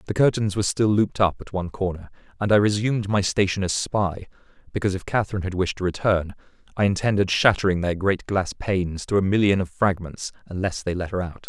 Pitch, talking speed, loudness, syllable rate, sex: 95 Hz, 210 wpm, -23 LUFS, 6.2 syllables/s, male